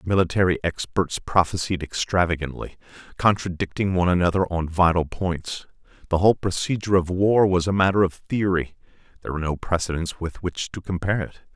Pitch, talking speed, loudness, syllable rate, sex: 90 Hz, 150 wpm, -23 LUFS, 5.8 syllables/s, male